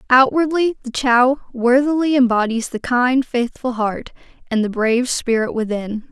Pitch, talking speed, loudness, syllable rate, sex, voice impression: 250 Hz, 135 wpm, -18 LUFS, 4.5 syllables/s, female, gender-neutral, slightly young, tensed, powerful, bright, clear, slightly halting, slightly cute, friendly, slightly unique, lively, kind